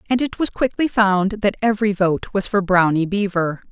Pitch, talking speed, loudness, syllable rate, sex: 200 Hz, 195 wpm, -19 LUFS, 5.1 syllables/s, female